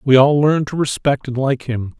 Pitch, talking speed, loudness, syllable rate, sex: 135 Hz, 240 wpm, -17 LUFS, 5.3 syllables/s, male